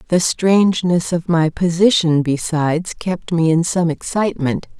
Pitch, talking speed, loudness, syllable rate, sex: 170 Hz, 140 wpm, -17 LUFS, 4.5 syllables/s, female